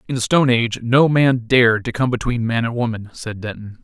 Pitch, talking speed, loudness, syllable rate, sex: 120 Hz, 235 wpm, -17 LUFS, 5.9 syllables/s, male